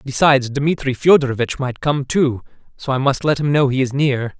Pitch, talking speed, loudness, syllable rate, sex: 135 Hz, 205 wpm, -17 LUFS, 5.3 syllables/s, male